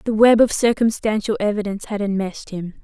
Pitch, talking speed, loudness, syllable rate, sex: 210 Hz, 170 wpm, -19 LUFS, 6.2 syllables/s, female